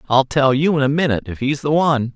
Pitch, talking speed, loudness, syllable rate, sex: 140 Hz, 280 wpm, -17 LUFS, 6.6 syllables/s, male